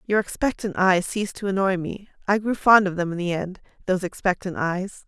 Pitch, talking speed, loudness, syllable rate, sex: 195 Hz, 215 wpm, -23 LUFS, 5.6 syllables/s, female